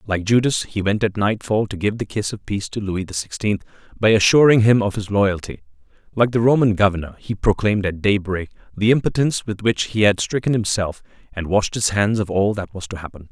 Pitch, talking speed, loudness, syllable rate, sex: 105 Hz, 215 wpm, -19 LUFS, 5.7 syllables/s, male